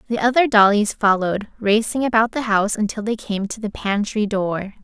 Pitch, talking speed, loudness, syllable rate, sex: 215 Hz, 185 wpm, -19 LUFS, 5.5 syllables/s, female